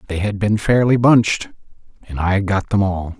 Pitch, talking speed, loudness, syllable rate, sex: 100 Hz, 190 wpm, -17 LUFS, 4.9 syllables/s, male